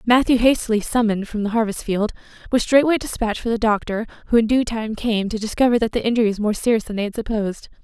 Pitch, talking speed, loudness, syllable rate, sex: 225 Hz, 230 wpm, -20 LUFS, 6.7 syllables/s, female